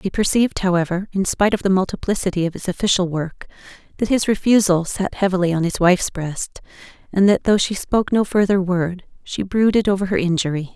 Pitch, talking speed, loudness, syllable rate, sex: 190 Hz, 190 wpm, -19 LUFS, 6.0 syllables/s, female